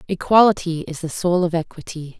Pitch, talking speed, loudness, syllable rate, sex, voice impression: 170 Hz, 165 wpm, -19 LUFS, 5.5 syllables/s, female, feminine, adult-like, clear, fluent, intellectual, slightly elegant, lively, strict, sharp